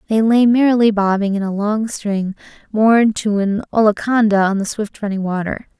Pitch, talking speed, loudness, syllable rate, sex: 210 Hz, 175 wpm, -16 LUFS, 5.1 syllables/s, female